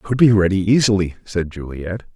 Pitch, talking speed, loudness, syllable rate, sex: 100 Hz, 195 wpm, -18 LUFS, 5.9 syllables/s, male